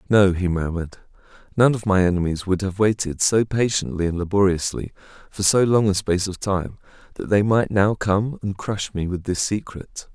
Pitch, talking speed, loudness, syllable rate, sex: 95 Hz, 190 wpm, -21 LUFS, 5.1 syllables/s, male